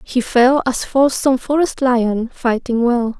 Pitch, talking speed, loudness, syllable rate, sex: 250 Hz, 170 wpm, -16 LUFS, 3.6 syllables/s, female